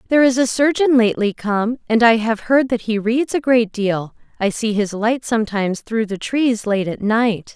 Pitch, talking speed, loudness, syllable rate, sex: 225 Hz, 205 wpm, -18 LUFS, 4.9 syllables/s, female